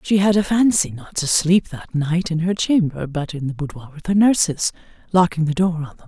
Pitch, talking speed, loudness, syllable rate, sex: 170 Hz, 235 wpm, -19 LUFS, 5.4 syllables/s, female